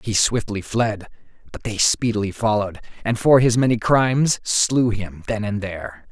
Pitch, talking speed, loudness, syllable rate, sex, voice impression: 110 Hz, 165 wpm, -20 LUFS, 4.8 syllables/s, male, very masculine, very adult-like, very thick, very tensed, very powerful, very bright, soft, clear, very fluent, very cool, very intellectual, refreshing, very sincere, very calm, very mature, very friendly, very reassuring, very unique, elegant, very wild, sweet, very lively, kind, intense